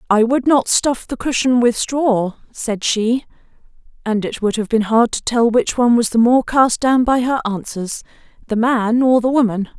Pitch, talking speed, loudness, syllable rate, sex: 235 Hz, 200 wpm, -16 LUFS, 4.6 syllables/s, female